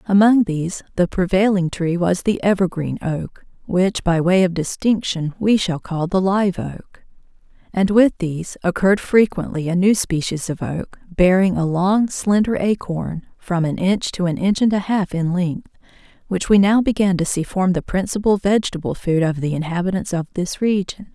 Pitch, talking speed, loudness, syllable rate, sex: 185 Hz, 180 wpm, -19 LUFS, 4.5 syllables/s, female